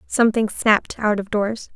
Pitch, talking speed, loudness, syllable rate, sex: 215 Hz, 170 wpm, -20 LUFS, 5.1 syllables/s, female